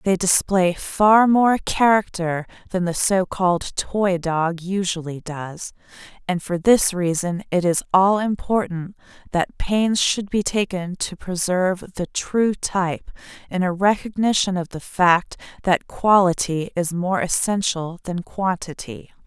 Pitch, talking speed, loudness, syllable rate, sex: 185 Hz, 135 wpm, -20 LUFS, 3.9 syllables/s, female